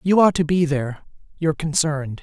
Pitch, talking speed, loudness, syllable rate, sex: 155 Hz, 160 wpm, -20 LUFS, 6.2 syllables/s, male